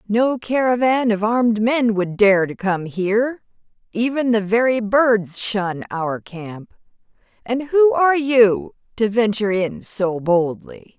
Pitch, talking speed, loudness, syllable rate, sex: 220 Hz, 140 wpm, -18 LUFS, 3.8 syllables/s, female